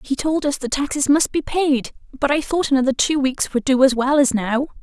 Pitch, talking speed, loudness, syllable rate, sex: 275 Hz, 250 wpm, -19 LUFS, 5.3 syllables/s, female